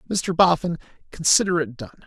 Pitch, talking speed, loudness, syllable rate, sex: 165 Hz, 145 wpm, -21 LUFS, 5.7 syllables/s, male